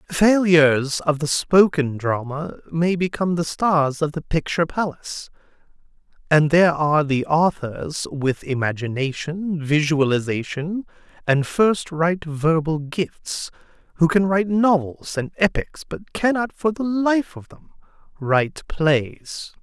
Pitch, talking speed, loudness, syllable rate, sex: 160 Hz, 125 wpm, -20 LUFS, 4.1 syllables/s, male